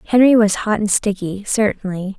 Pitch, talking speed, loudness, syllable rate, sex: 205 Hz, 165 wpm, -17 LUFS, 5.1 syllables/s, female